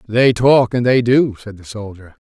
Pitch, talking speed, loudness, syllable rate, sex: 115 Hz, 185 wpm, -14 LUFS, 4.6 syllables/s, male